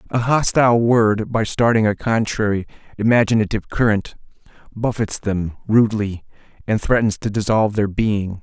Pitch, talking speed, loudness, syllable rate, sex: 110 Hz, 130 wpm, -18 LUFS, 5.1 syllables/s, male